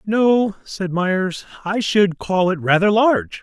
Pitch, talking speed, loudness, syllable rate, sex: 195 Hz, 160 wpm, -18 LUFS, 3.6 syllables/s, male